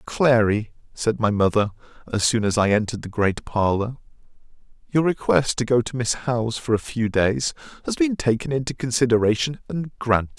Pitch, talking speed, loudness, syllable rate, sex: 115 Hz, 175 wpm, -22 LUFS, 5.4 syllables/s, male